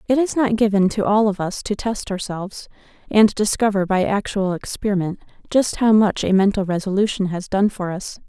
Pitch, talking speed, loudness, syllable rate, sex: 205 Hz, 190 wpm, -19 LUFS, 5.4 syllables/s, female